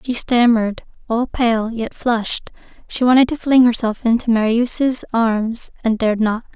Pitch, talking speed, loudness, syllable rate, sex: 230 Hz, 155 wpm, -17 LUFS, 4.6 syllables/s, female